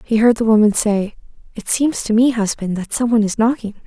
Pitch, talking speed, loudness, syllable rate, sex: 220 Hz, 235 wpm, -16 LUFS, 5.7 syllables/s, female